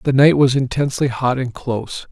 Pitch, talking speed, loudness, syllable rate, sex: 130 Hz, 200 wpm, -17 LUFS, 5.6 syllables/s, male